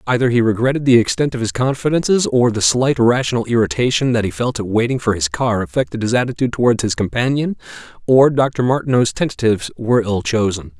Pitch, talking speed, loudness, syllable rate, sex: 120 Hz, 190 wpm, -16 LUFS, 6.3 syllables/s, male